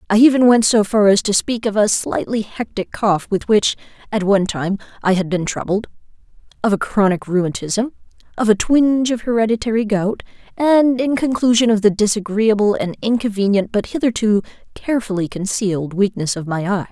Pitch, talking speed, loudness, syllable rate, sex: 210 Hz, 160 wpm, -17 LUFS, 5.4 syllables/s, female